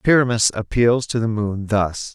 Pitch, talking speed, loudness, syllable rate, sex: 110 Hz, 170 wpm, -19 LUFS, 4.3 syllables/s, male